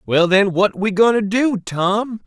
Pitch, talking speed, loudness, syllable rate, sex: 205 Hz, 210 wpm, -17 LUFS, 3.9 syllables/s, male